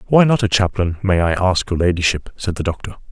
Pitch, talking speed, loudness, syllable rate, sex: 95 Hz, 230 wpm, -17 LUFS, 6.0 syllables/s, male